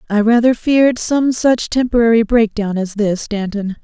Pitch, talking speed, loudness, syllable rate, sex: 225 Hz, 155 wpm, -15 LUFS, 4.8 syllables/s, female